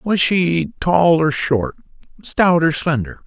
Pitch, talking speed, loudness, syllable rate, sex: 155 Hz, 145 wpm, -17 LUFS, 3.4 syllables/s, male